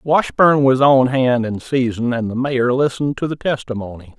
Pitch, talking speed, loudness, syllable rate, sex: 130 Hz, 185 wpm, -17 LUFS, 4.8 syllables/s, male